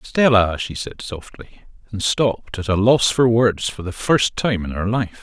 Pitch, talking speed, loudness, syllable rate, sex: 105 Hz, 195 wpm, -19 LUFS, 4.5 syllables/s, male